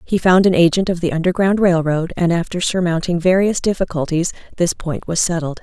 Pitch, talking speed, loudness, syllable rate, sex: 175 Hz, 190 wpm, -17 LUFS, 5.5 syllables/s, female